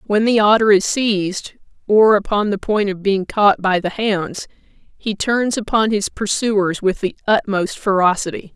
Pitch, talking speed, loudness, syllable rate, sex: 205 Hz, 170 wpm, -17 LUFS, 4.2 syllables/s, female